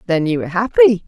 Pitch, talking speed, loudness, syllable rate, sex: 205 Hz, 225 wpm, -15 LUFS, 6.6 syllables/s, female